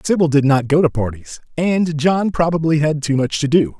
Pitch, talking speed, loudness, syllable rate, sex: 155 Hz, 220 wpm, -17 LUFS, 5.1 syllables/s, male